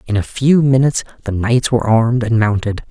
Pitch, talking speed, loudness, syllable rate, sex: 115 Hz, 205 wpm, -15 LUFS, 5.9 syllables/s, male